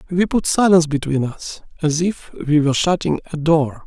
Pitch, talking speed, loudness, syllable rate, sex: 160 Hz, 185 wpm, -18 LUFS, 5.4 syllables/s, male